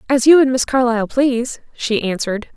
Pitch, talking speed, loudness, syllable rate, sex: 245 Hz, 190 wpm, -16 LUFS, 5.9 syllables/s, female